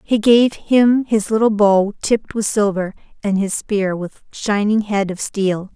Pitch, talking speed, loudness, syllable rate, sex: 210 Hz, 175 wpm, -17 LUFS, 4.0 syllables/s, female